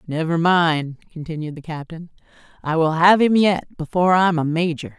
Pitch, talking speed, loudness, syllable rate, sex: 165 Hz, 170 wpm, -18 LUFS, 5.1 syllables/s, female